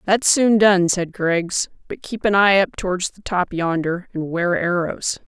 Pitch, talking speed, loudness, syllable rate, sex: 185 Hz, 190 wpm, -19 LUFS, 4.1 syllables/s, female